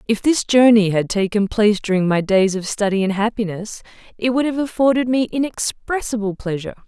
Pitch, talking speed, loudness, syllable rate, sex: 215 Hz, 175 wpm, -18 LUFS, 5.6 syllables/s, female